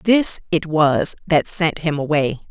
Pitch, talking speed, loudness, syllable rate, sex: 160 Hz, 170 wpm, -18 LUFS, 3.8 syllables/s, female